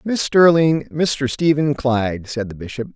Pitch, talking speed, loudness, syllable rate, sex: 140 Hz, 165 wpm, -18 LUFS, 4.3 syllables/s, male